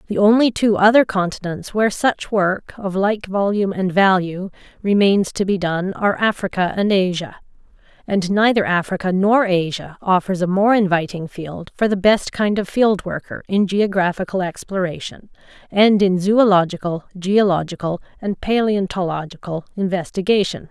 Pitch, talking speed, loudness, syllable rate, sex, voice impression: 195 Hz, 140 wpm, -18 LUFS, 4.9 syllables/s, female, feminine, middle-aged, tensed, powerful, clear, fluent, intellectual, friendly, elegant, lively, slightly strict